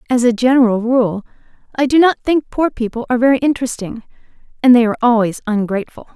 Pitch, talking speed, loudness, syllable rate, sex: 240 Hz, 175 wpm, -15 LUFS, 6.6 syllables/s, female